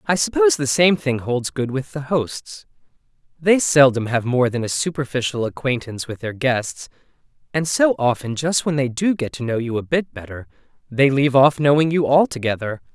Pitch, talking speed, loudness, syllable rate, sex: 130 Hz, 190 wpm, -19 LUFS, 5.2 syllables/s, male